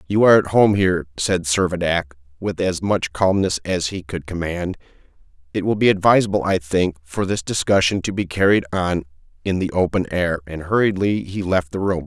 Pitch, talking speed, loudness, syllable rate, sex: 90 Hz, 190 wpm, -20 LUFS, 5.3 syllables/s, male